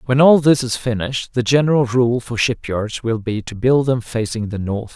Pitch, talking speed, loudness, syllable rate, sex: 120 Hz, 220 wpm, -18 LUFS, 5.0 syllables/s, male